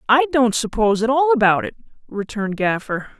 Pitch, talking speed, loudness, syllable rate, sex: 230 Hz, 170 wpm, -18 LUFS, 5.9 syllables/s, female